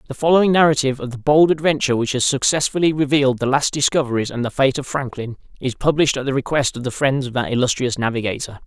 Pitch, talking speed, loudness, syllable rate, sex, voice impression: 135 Hz, 215 wpm, -18 LUFS, 6.8 syllables/s, male, masculine, adult-like, tensed, powerful, bright, clear, slightly nasal, intellectual, calm, friendly, unique, slightly wild, lively, slightly light